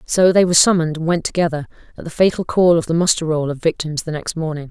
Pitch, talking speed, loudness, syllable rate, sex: 165 Hz, 255 wpm, -17 LUFS, 6.7 syllables/s, female